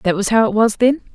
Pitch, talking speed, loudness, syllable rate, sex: 220 Hz, 315 wpm, -15 LUFS, 6.0 syllables/s, female